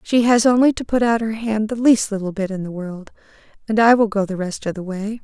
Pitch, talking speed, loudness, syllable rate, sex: 215 Hz, 275 wpm, -18 LUFS, 5.7 syllables/s, female